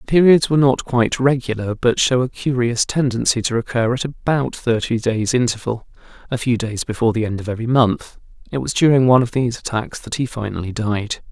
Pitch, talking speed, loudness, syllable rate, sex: 120 Hz, 200 wpm, -18 LUFS, 5.9 syllables/s, male